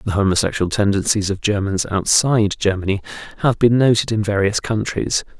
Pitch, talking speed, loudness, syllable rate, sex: 105 Hz, 145 wpm, -18 LUFS, 5.5 syllables/s, male